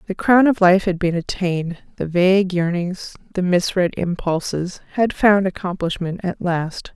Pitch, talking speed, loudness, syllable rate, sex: 185 Hz, 155 wpm, -19 LUFS, 4.5 syllables/s, female